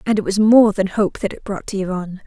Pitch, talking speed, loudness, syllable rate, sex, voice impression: 200 Hz, 290 wpm, -18 LUFS, 6.1 syllables/s, female, feminine, slightly young, thin, weak, soft, fluent, raspy, slightly cute, friendly, reassuring, kind, modest